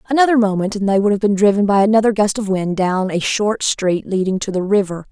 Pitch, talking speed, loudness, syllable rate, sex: 205 Hz, 245 wpm, -16 LUFS, 5.9 syllables/s, female